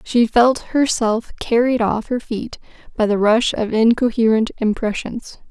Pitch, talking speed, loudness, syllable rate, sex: 230 Hz, 140 wpm, -18 LUFS, 4.2 syllables/s, female